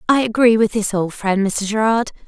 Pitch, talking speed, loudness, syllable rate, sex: 215 Hz, 210 wpm, -17 LUFS, 5.1 syllables/s, female